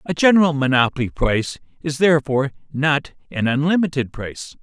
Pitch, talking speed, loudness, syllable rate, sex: 145 Hz, 130 wpm, -19 LUFS, 5.9 syllables/s, male